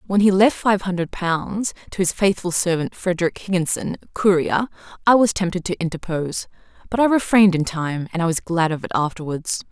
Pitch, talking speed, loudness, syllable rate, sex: 180 Hz, 185 wpm, -20 LUFS, 5.5 syllables/s, female